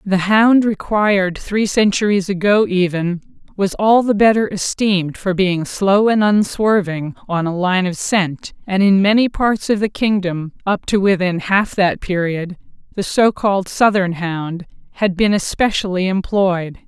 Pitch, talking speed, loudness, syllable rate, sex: 195 Hz, 155 wpm, -16 LUFS, 4.3 syllables/s, female